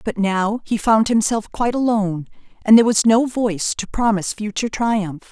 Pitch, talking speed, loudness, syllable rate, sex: 215 Hz, 180 wpm, -18 LUFS, 5.6 syllables/s, female